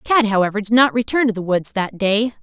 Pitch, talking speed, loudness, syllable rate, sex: 215 Hz, 250 wpm, -17 LUFS, 5.7 syllables/s, female